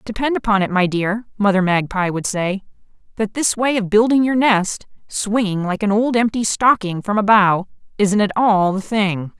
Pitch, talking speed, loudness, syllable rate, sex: 205 Hz, 190 wpm, -17 LUFS, 4.7 syllables/s, female